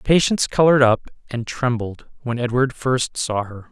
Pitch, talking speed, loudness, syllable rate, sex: 125 Hz, 160 wpm, -20 LUFS, 5.0 syllables/s, male